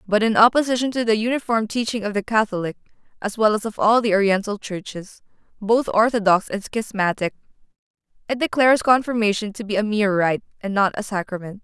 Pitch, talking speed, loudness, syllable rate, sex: 215 Hz, 175 wpm, -20 LUFS, 6.0 syllables/s, female